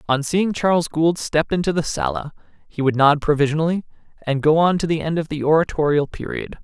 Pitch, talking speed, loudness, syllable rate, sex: 155 Hz, 200 wpm, -19 LUFS, 5.8 syllables/s, male